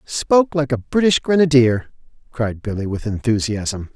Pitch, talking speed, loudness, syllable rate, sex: 125 Hz, 135 wpm, -18 LUFS, 4.6 syllables/s, male